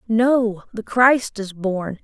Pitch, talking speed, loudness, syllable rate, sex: 215 Hz, 150 wpm, -19 LUFS, 2.8 syllables/s, female